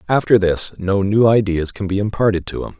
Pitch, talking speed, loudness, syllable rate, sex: 100 Hz, 215 wpm, -17 LUFS, 5.5 syllables/s, male